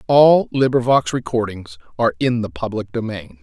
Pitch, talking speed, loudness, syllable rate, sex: 115 Hz, 140 wpm, -18 LUFS, 5.1 syllables/s, male